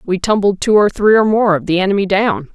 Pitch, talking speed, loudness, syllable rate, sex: 200 Hz, 260 wpm, -13 LUFS, 5.8 syllables/s, female